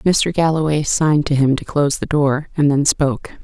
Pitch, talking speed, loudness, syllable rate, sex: 145 Hz, 210 wpm, -17 LUFS, 5.2 syllables/s, female